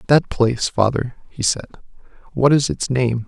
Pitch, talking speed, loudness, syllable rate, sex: 125 Hz, 165 wpm, -19 LUFS, 4.8 syllables/s, male